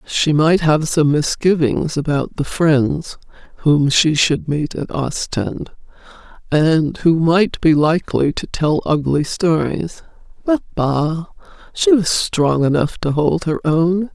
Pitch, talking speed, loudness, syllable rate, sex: 155 Hz, 135 wpm, -17 LUFS, 3.6 syllables/s, female